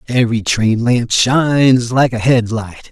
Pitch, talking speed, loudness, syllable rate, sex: 120 Hz, 165 wpm, -14 LUFS, 4.2 syllables/s, male